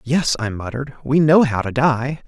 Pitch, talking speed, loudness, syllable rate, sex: 135 Hz, 210 wpm, -18 LUFS, 5.0 syllables/s, male